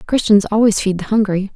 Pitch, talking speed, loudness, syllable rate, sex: 205 Hz, 195 wpm, -15 LUFS, 5.7 syllables/s, female